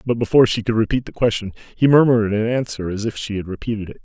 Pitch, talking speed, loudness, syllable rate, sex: 110 Hz, 250 wpm, -19 LUFS, 7.1 syllables/s, male